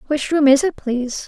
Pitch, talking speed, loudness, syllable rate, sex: 285 Hz, 235 wpm, -17 LUFS, 5.5 syllables/s, female